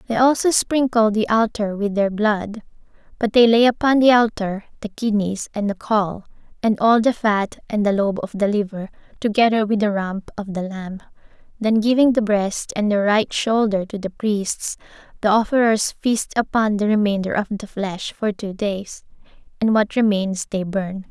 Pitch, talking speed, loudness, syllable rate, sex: 210 Hz, 180 wpm, -19 LUFS, 4.6 syllables/s, female